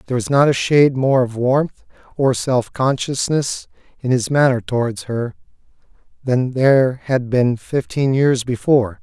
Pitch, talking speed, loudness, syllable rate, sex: 130 Hz, 155 wpm, -17 LUFS, 4.5 syllables/s, male